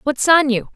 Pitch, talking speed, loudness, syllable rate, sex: 275 Hz, 240 wpm, -15 LUFS, 4.6 syllables/s, female